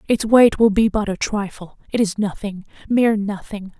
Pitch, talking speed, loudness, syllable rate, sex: 205 Hz, 160 wpm, -18 LUFS, 5.0 syllables/s, female